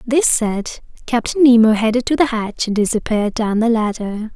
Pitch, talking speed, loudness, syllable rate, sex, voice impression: 230 Hz, 180 wpm, -16 LUFS, 5.0 syllables/s, female, feminine, adult-like, slightly relaxed, slightly dark, soft, raspy, calm, friendly, reassuring, kind, slightly modest